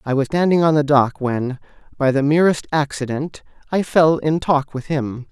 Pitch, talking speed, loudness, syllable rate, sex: 145 Hz, 190 wpm, -18 LUFS, 4.7 syllables/s, male